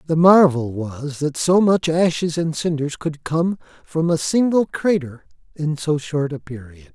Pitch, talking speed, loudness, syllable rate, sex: 155 Hz, 175 wpm, -19 LUFS, 4.2 syllables/s, male